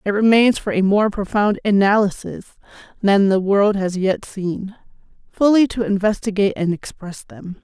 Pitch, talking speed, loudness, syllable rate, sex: 205 Hz, 150 wpm, -18 LUFS, 4.7 syllables/s, female